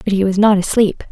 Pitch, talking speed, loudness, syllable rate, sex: 200 Hz, 270 wpm, -14 LUFS, 6.0 syllables/s, female